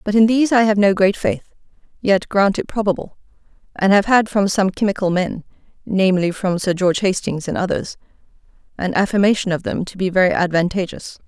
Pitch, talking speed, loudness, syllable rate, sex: 195 Hz, 180 wpm, -18 LUFS, 5.8 syllables/s, female